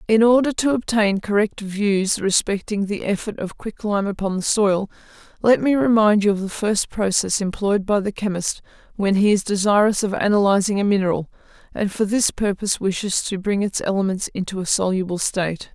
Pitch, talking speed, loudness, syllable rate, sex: 205 Hz, 185 wpm, -20 LUFS, 5.3 syllables/s, female